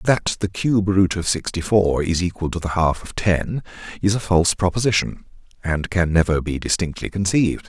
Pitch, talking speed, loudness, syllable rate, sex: 90 Hz, 190 wpm, -20 LUFS, 5.1 syllables/s, male